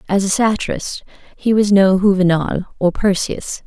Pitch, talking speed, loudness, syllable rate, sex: 195 Hz, 145 wpm, -16 LUFS, 4.9 syllables/s, female